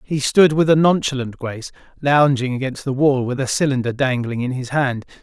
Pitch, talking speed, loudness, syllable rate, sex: 135 Hz, 195 wpm, -18 LUFS, 5.4 syllables/s, male